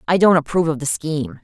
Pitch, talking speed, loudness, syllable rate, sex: 160 Hz, 250 wpm, -18 LUFS, 7.1 syllables/s, female